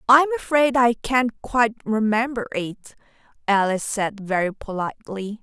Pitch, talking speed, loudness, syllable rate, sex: 225 Hz, 120 wpm, -22 LUFS, 4.6 syllables/s, female